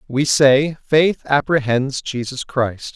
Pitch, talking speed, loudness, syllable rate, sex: 135 Hz, 120 wpm, -17 LUFS, 3.3 syllables/s, male